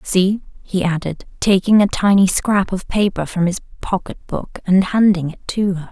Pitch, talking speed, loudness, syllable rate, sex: 190 Hz, 185 wpm, -17 LUFS, 4.6 syllables/s, female